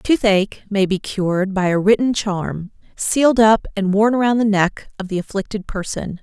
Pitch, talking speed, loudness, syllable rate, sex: 205 Hz, 185 wpm, -18 LUFS, 4.9 syllables/s, female